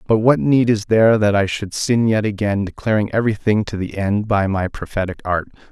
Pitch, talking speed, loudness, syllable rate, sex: 105 Hz, 210 wpm, -18 LUFS, 5.5 syllables/s, male